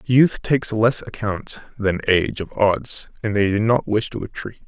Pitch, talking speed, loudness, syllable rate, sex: 110 Hz, 190 wpm, -20 LUFS, 4.7 syllables/s, male